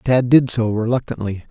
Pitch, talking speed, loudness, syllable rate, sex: 115 Hz, 160 wpm, -18 LUFS, 5.2 syllables/s, male